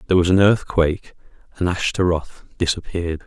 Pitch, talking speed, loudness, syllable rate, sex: 90 Hz, 130 wpm, -20 LUFS, 6.1 syllables/s, male